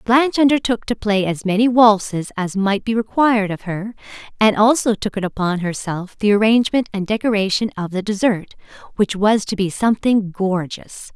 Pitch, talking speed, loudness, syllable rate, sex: 210 Hz, 165 wpm, -18 LUFS, 5.1 syllables/s, female